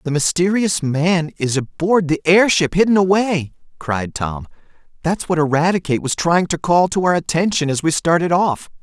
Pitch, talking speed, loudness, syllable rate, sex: 165 Hz, 165 wpm, -17 LUFS, 4.9 syllables/s, male